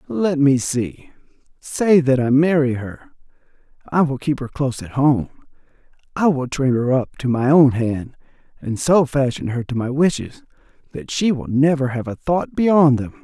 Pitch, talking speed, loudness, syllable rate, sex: 140 Hz, 180 wpm, -18 LUFS, 4.5 syllables/s, male